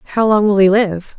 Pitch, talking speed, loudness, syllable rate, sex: 205 Hz, 255 wpm, -13 LUFS, 5.8 syllables/s, female